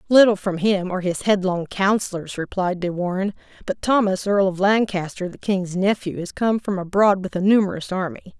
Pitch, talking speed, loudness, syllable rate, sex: 190 Hz, 185 wpm, -21 LUFS, 5.2 syllables/s, female